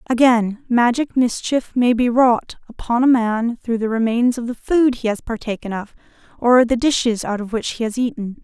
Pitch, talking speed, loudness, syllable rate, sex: 235 Hz, 200 wpm, -18 LUFS, 4.8 syllables/s, female